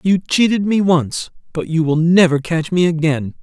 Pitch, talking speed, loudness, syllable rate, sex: 165 Hz, 195 wpm, -16 LUFS, 4.6 syllables/s, male